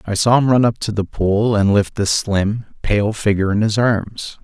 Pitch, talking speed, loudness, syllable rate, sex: 105 Hz, 230 wpm, -17 LUFS, 4.6 syllables/s, male